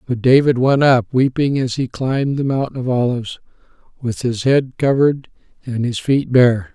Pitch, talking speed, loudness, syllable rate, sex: 130 Hz, 180 wpm, -17 LUFS, 4.8 syllables/s, male